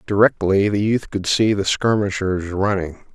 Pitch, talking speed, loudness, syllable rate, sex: 100 Hz, 155 wpm, -19 LUFS, 4.5 syllables/s, male